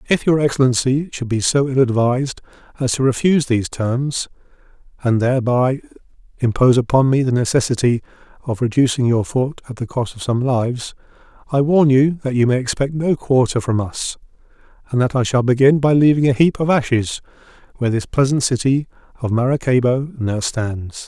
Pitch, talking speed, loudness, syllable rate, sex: 130 Hz, 170 wpm, -17 LUFS, 5.5 syllables/s, male